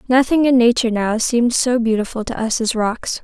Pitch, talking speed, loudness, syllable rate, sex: 235 Hz, 205 wpm, -17 LUFS, 5.6 syllables/s, female